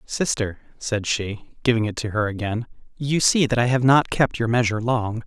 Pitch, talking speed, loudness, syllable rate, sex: 115 Hz, 205 wpm, -22 LUFS, 5.0 syllables/s, male